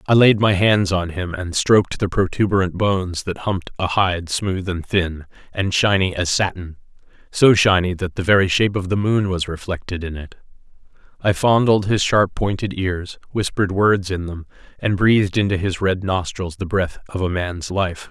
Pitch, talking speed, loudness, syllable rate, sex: 95 Hz, 185 wpm, -19 LUFS, 4.9 syllables/s, male